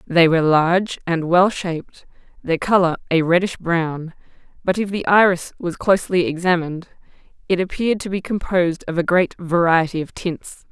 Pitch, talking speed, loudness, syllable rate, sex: 175 Hz, 160 wpm, -19 LUFS, 5.2 syllables/s, female